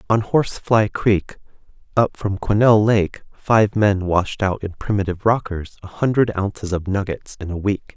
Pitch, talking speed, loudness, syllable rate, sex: 100 Hz, 175 wpm, -19 LUFS, 4.6 syllables/s, male